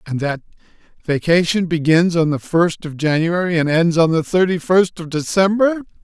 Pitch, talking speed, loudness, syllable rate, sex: 170 Hz, 170 wpm, -17 LUFS, 4.9 syllables/s, male